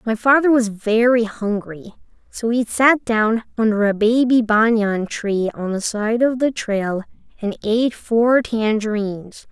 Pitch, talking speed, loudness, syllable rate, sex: 225 Hz, 150 wpm, -18 LUFS, 4.1 syllables/s, female